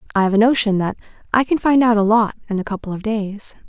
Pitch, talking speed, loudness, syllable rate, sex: 215 Hz, 260 wpm, -18 LUFS, 6.4 syllables/s, female